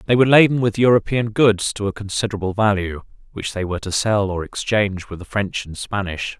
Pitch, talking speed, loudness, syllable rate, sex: 105 Hz, 205 wpm, -19 LUFS, 5.9 syllables/s, male